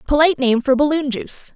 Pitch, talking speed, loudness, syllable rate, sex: 280 Hz, 230 wpm, -17 LUFS, 7.0 syllables/s, female